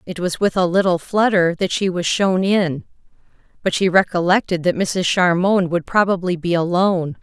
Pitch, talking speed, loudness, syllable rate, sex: 180 Hz, 175 wpm, -18 LUFS, 5.0 syllables/s, female